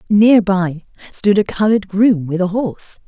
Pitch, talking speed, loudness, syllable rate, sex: 195 Hz, 175 wpm, -15 LUFS, 4.8 syllables/s, female